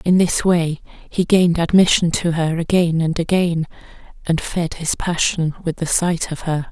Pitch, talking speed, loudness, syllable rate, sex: 170 Hz, 180 wpm, -18 LUFS, 4.5 syllables/s, female